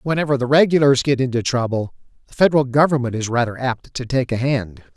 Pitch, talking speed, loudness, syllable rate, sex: 130 Hz, 195 wpm, -18 LUFS, 5.9 syllables/s, male